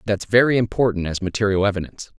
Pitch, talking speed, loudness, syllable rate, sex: 105 Hz, 165 wpm, -20 LUFS, 6.9 syllables/s, male